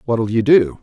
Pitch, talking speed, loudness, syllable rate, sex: 115 Hz, 220 wpm, -15 LUFS, 4.2 syllables/s, male